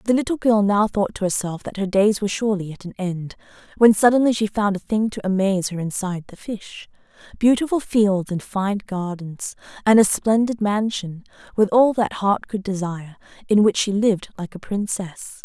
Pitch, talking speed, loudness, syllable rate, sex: 205 Hz, 185 wpm, -20 LUFS, 5.2 syllables/s, female